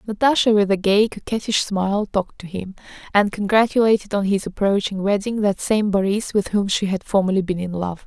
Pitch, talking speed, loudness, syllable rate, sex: 200 Hz, 195 wpm, -20 LUFS, 5.6 syllables/s, female